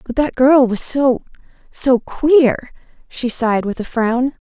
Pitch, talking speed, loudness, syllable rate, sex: 250 Hz, 150 wpm, -16 LUFS, 3.8 syllables/s, female